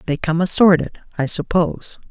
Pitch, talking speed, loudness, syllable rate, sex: 165 Hz, 140 wpm, -17 LUFS, 5.4 syllables/s, female